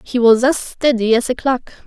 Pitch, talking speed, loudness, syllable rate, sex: 245 Hz, 225 wpm, -16 LUFS, 4.9 syllables/s, female